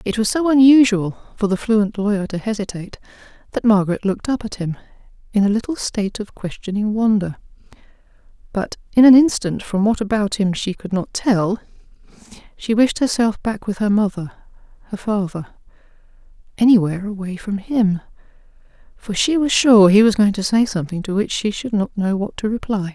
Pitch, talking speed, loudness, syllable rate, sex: 210 Hz, 165 wpm, -18 LUFS, 5.5 syllables/s, female